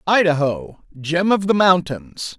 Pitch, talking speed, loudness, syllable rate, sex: 175 Hz, 125 wpm, -17 LUFS, 3.7 syllables/s, male